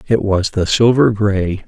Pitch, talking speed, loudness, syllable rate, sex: 105 Hz, 180 wpm, -15 LUFS, 3.9 syllables/s, male